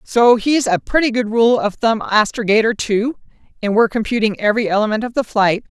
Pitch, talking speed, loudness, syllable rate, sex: 220 Hz, 185 wpm, -16 LUFS, 5.7 syllables/s, female